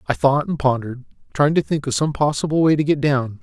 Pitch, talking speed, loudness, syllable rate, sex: 140 Hz, 245 wpm, -19 LUFS, 6.0 syllables/s, male